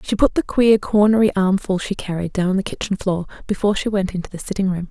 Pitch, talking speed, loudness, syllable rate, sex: 195 Hz, 245 wpm, -19 LUFS, 6.4 syllables/s, female